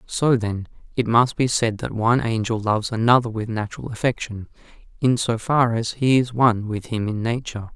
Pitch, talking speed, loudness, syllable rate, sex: 115 Hz, 195 wpm, -21 LUFS, 5.4 syllables/s, male